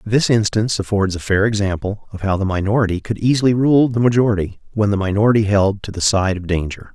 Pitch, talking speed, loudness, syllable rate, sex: 105 Hz, 200 wpm, -17 LUFS, 6.1 syllables/s, male